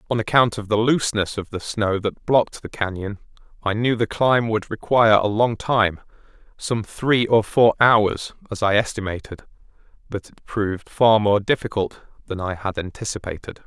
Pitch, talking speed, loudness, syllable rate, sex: 110 Hz, 170 wpm, -20 LUFS, 4.9 syllables/s, male